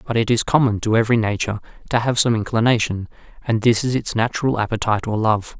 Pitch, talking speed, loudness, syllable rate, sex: 115 Hz, 205 wpm, -19 LUFS, 6.6 syllables/s, male